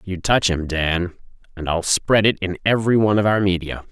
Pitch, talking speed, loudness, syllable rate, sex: 95 Hz, 215 wpm, -19 LUFS, 5.5 syllables/s, male